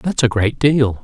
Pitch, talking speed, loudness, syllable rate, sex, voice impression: 125 Hz, 230 wpm, -16 LUFS, 4.2 syllables/s, male, masculine, adult-like, slightly muffled, slightly cool, slightly refreshing, sincere, friendly